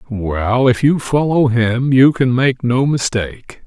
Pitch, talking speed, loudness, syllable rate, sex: 125 Hz, 165 wpm, -15 LUFS, 3.8 syllables/s, male